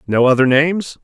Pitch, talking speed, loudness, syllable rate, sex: 145 Hz, 175 wpm, -14 LUFS, 5.8 syllables/s, male